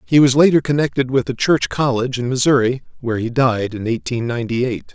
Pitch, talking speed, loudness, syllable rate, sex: 125 Hz, 205 wpm, -17 LUFS, 6.2 syllables/s, male